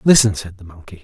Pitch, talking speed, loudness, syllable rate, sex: 100 Hz, 230 wpm, -16 LUFS, 6.5 syllables/s, male